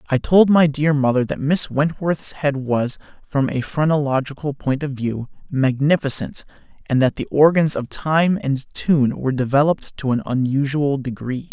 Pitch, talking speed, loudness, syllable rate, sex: 140 Hz, 160 wpm, -19 LUFS, 4.6 syllables/s, male